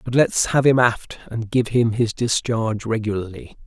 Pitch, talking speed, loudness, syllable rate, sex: 115 Hz, 180 wpm, -20 LUFS, 4.7 syllables/s, male